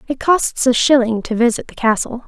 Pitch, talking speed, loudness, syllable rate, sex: 245 Hz, 210 wpm, -16 LUFS, 5.2 syllables/s, female